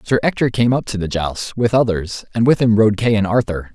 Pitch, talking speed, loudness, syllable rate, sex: 110 Hz, 255 wpm, -17 LUFS, 5.3 syllables/s, male